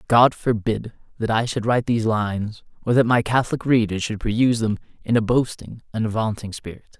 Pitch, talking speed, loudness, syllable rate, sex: 115 Hz, 190 wpm, -21 LUFS, 5.8 syllables/s, male